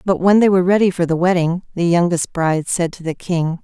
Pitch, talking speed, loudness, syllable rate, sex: 175 Hz, 250 wpm, -17 LUFS, 5.9 syllables/s, female